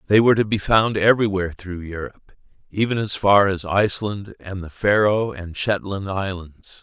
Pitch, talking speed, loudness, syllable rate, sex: 100 Hz, 165 wpm, -20 LUFS, 5.1 syllables/s, male